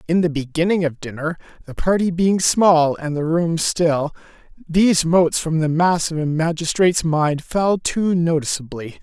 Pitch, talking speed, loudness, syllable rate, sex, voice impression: 165 Hz, 165 wpm, -19 LUFS, 4.6 syllables/s, male, masculine, slightly old, slightly thick, muffled, sincere, slightly friendly, reassuring